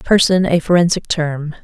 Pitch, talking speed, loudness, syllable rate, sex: 165 Hz, 145 wpm, -15 LUFS, 4.7 syllables/s, female